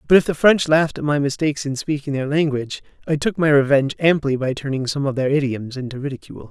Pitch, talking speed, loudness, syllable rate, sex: 145 Hz, 230 wpm, -19 LUFS, 6.6 syllables/s, male